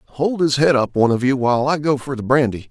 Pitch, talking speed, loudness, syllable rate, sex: 135 Hz, 290 wpm, -18 LUFS, 6.4 syllables/s, male